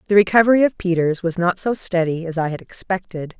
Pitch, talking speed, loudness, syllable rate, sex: 185 Hz, 210 wpm, -19 LUFS, 6.0 syllables/s, female